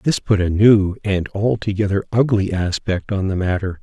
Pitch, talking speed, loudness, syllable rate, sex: 100 Hz, 175 wpm, -18 LUFS, 4.8 syllables/s, male